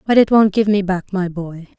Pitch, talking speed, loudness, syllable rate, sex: 195 Hz, 270 wpm, -16 LUFS, 5.0 syllables/s, female